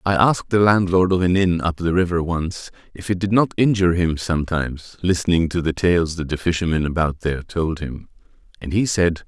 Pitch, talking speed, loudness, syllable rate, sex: 85 Hz, 205 wpm, -20 LUFS, 5.6 syllables/s, male